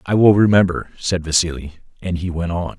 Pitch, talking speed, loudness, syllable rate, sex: 90 Hz, 195 wpm, -17 LUFS, 5.5 syllables/s, male